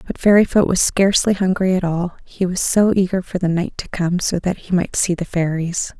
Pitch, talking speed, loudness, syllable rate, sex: 185 Hz, 230 wpm, -18 LUFS, 5.2 syllables/s, female